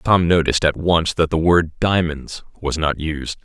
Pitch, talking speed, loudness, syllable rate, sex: 80 Hz, 190 wpm, -18 LUFS, 4.4 syllables/s, male